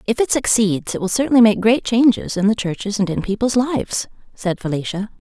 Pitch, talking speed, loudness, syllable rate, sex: 215 Hz, 205 wpm, -18 LUFS, 5.7 syllables/s, female